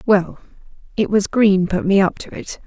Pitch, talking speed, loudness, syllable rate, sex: 195 Hz, 180 wpm, -17 LUFS, 4.7 syllables/s, female